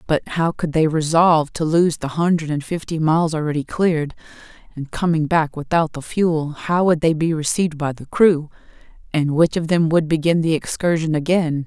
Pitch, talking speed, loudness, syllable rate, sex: 160 Hz, 190 wpm, -19 LUFS, 5.2 syllables/s, female